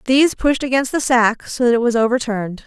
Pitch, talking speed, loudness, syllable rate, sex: 245 Hz, 225 wpm, -17 LUFS, 5.9 syllables/s, female